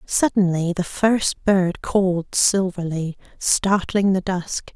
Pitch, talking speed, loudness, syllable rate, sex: 185 Hz, 115 wpm, -20 LUFS, 3.5 syllables/s, female